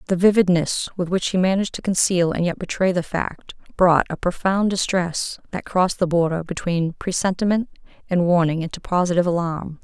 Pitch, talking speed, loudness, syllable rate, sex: 180 Hz, 170 wpm, -21 LUFS, 5.5 syllables/s, female